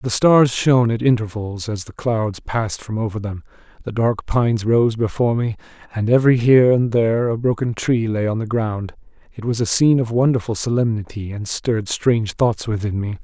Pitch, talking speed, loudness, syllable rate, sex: 115 Hz, 195 wpm, -19 LUFS, 5.5 syllables/s, male